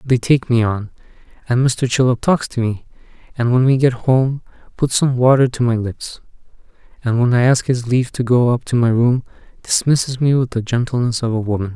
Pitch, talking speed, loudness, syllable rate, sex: 125 Hz, 215 wpm, -17 LUFS, 5.5 syllables/s, male